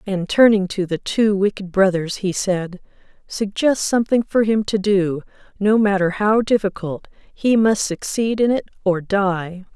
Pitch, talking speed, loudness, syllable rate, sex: 200 Hz, 160 wpm, -19 LUFS, 4.3 syllables/s, female